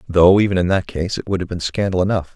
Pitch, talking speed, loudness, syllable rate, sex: 95 Hz, 280 wpm, -18 LUFS, 6.5 syllables/s, male